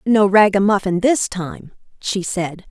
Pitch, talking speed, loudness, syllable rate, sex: 195 Hz, 135 wpm, -17 LUFS, 3.9 syllables/s, female